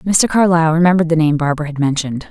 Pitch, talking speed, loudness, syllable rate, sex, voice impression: 160 Hz, 210 wpm, -14 LUFS, 7.5 syllables/s, female, feminine, adult-like, slightly hard, fluent, raspy, intellectual, calm, slightly elegant, slightly strict, slightly sharp